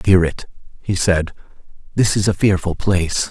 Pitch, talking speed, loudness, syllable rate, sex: 95 Hz, 145 wpm, -18 LUFS, 4.8 syllables/s, male